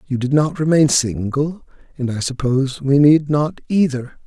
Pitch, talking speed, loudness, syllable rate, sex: 140 Hz, 170 wpm, -17 LUFS, 4.6 syllables/s, male